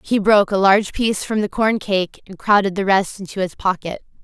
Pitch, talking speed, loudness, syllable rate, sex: 200 Hz, 225 wpm, -18 LUFS, 5.7 syllables/s, female